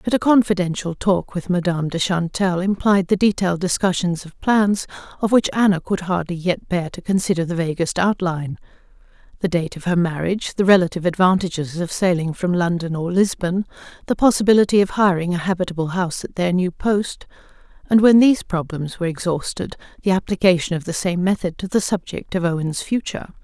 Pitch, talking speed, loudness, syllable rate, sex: 180 Hz, 175 wpm, -19 LUFS, 5.9 syllables/s, female